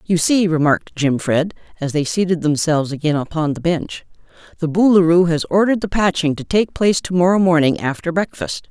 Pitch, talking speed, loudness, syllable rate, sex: 170 Hz, 180 wpm, -17 LUFS, 5.7 syllables/s, female